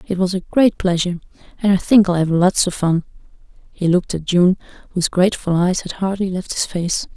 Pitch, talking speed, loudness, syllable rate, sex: 185 Hz, 210 wpm, -18 LUFS, 5.8 syllables/s, female